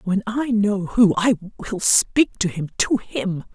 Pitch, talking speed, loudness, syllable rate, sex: 205 Hz, 170 wpm, -20 LUFS, 3.9 syllables/s, female